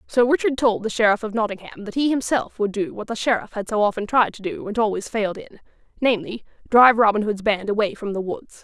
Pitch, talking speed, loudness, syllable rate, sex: 220 Hz, 230 wpm, -21 LUFS, 6.2 syllables/s, female